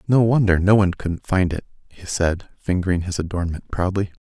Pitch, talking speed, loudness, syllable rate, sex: 90 Hz, 185 wpm, -21 LUFS, 5.5 syllables/s, male